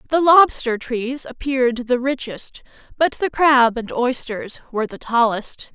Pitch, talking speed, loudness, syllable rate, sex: 255 Hz, 145 wpm, -19 LUFS, 4.2 syllables/s, female